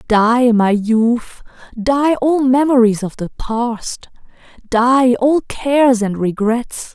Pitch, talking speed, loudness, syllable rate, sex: 240 Hz, 120 wpm, -15 LUFS, 3.1 syllables/s, female